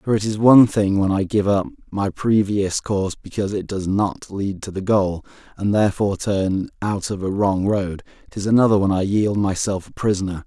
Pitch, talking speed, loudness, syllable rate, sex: 100 Hz, 210 wpm, -20 LUFS, 5.4 syllables/s, male